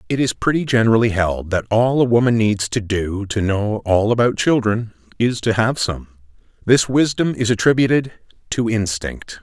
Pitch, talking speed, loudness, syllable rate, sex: 110 Hz, 170 wpm, -18 LUFS, 4.9 syllables/s, male